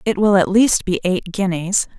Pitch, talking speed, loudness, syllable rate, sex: 190 Hz, 210 wpm, -17 LUFS, 4.6 syllables/s, female